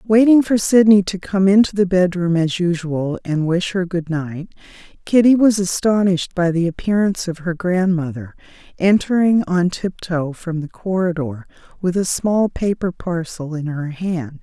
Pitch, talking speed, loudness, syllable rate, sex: 180 Hz, 160 wpm, -18 LUFS, 4.6 syllables/s, female